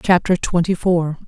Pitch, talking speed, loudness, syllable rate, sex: 175 Hz, 140 wpm, -18 LUFS, 4.6 syllables/s, female